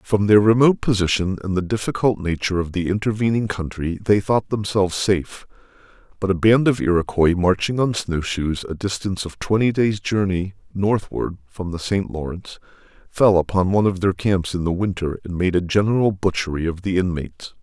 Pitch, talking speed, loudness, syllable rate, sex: 95 Hz, 180 wpm, -20 LUFS, 5.5 syllables/s, male